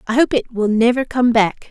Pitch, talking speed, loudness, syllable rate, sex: 235 Hz, 245 wpm, -16 LUFS, 5.2 syllables/s, female